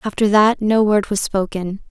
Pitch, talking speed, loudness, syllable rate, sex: 205 Hz, 190 wpm, -17 LUFS, 4.6 syllables/s, female